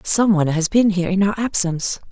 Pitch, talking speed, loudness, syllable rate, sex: 190 Hz, 225 wpm, -18 LUFS, 6.4 syllables/s, female